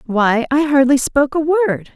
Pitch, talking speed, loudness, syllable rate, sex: 275 Hz, 185 wpm, -15 LUFS, 4.6 syllables/s, female